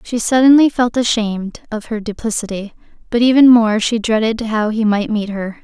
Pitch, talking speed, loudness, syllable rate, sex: 225 Hz, 180 wpm, -15 LUFS, 5.1 syllables/s, female